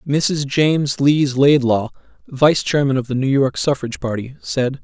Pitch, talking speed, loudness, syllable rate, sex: 135 Hz, 160 wpm, -17 LUFS, 4.5 syllables/s, male